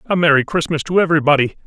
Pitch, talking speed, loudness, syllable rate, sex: 155 Hz, 180 wpm, -15 LUFS, 7.5 syllables/s, male